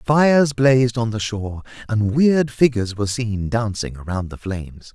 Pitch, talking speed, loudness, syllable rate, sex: 115 Hz, 170 wpm, -19 LUFS, 5.0 syllables/s, male